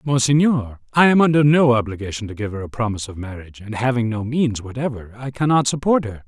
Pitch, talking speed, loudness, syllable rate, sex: 120 Hz, 210 wpm, -19 LUFS, 6.2 syllables/s, male